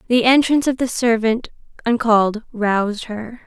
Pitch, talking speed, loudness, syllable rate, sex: 230 Hz, 140 wpm, -18 LUFS, 4.9 syllables/s, female